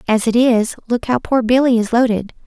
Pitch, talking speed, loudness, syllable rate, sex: 235 Hz, 220 wpm, -16 LUFS, 5.3 syllables/s, female